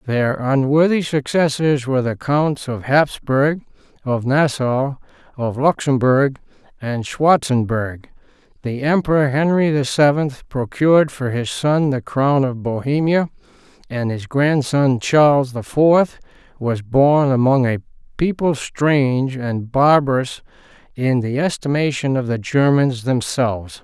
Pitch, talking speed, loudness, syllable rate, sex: 135 Hz, 120 wpm, -18 LUFS, 4.1 syllables/s, male